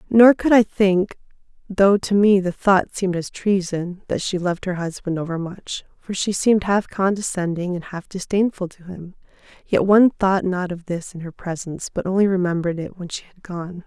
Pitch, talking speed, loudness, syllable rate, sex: 185 Hz, 195 wpm, -20 LUFS, 5.2 syllables/s, female